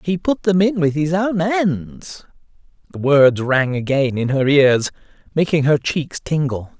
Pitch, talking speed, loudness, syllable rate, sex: 155 Hz, 160 wpm, -17 LUFS, 4.0 syllables/s, male